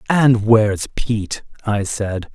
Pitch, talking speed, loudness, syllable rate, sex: 110 Hz, 130 wpm, -18 LUFS, 3.9 syllables/s, male